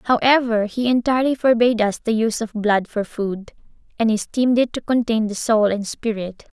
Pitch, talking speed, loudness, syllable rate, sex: 225 Hz, 180 wpm, -19 LUFS, 5.4 syllables/s, female